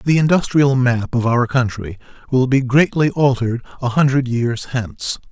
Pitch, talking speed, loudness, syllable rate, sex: 125 Hz, 160 wpm, -17 LUFS, 4.8 syllables/s, male